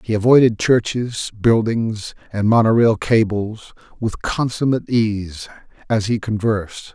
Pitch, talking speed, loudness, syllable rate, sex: 110 Hz, 120 wpm, -18 LUFS, 4.3 syllables/s, male